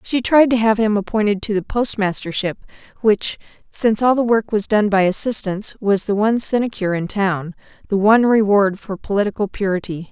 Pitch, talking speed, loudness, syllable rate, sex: 205 Hz, 180 wpm, -18 LUFS, 5.5 syllables/s, female